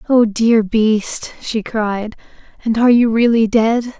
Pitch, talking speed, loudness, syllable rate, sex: 225 Hz, 150 wpm, -15 LUFS, 3.9 syllables/s, female